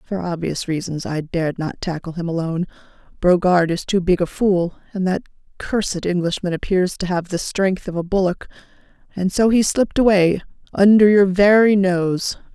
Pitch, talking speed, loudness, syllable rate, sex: 185 Hz, 170 wpm, -18 LUFS, 5.1 syllables/s, female